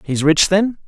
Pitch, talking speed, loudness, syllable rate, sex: 180 Hz, 275 wpm, -15 LUFS, 5.6 syllables/s, male